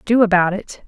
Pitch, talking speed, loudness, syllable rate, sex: 200 Hz, 205 wpm, -16 LUFS, 5.2 syllables/s, female